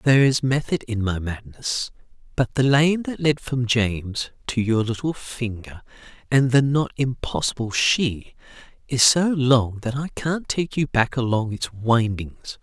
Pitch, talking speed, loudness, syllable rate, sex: 125 Hz, 160 wpm, -22 LUFS, 4.1 syllables/s, male